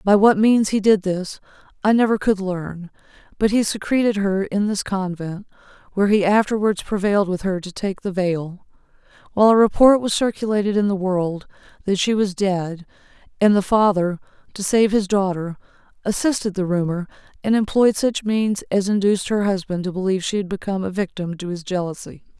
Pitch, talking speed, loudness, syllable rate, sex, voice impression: 195 Hz, 180 wpm, -20 LUFS, 5.4 syllables/s, female, very feminine, adult-like, slightly middle-aged, very thin, slightly relaxed, very weak, slightly dark, soft, muffled, slightly halting, slightly raspy, slightly cute, intellectual, sincere, slightly calm, friendly, slightly reassuring, slightly unique, elegant, kind, modest